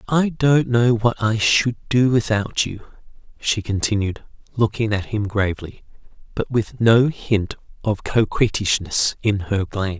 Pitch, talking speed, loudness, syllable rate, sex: 110 Hz, 145 wpm, -20 LUFS, 4.1 syllables/s, male